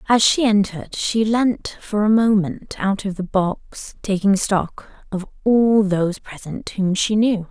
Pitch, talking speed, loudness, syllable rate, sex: 200 Hz, 170 wpm, -19 LUFS, 4.0 syllables/s, female